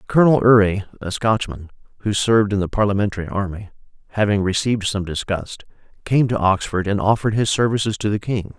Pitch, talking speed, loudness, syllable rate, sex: 105 Hz, 170 wpm, -19 LUFS, 6.1 syllables/s, male